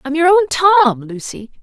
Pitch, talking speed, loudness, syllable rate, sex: 305 Hz, 185 wpm, -12 LUFS, 5.9 syllables/s, female